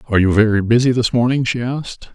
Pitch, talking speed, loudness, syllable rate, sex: 120 Hz, 225 wpm, -16 LUFS, 6.6 syllables/s, male